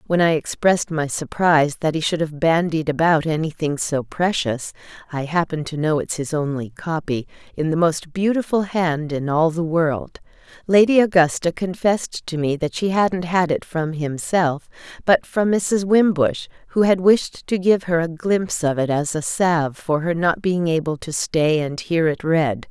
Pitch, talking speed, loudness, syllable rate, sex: 165 Hz, 185 wpm, -20 LUFS, 3.9 syllables/s, female